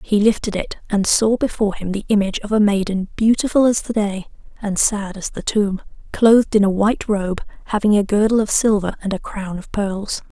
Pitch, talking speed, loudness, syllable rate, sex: 205 Hz, 210 wpm, -18 LUFS, 5.4 syllables/s, female